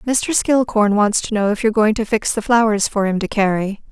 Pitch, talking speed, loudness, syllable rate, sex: 215 Hz, 245 wpm, -17 LUFS, 5.2 syllables/s, female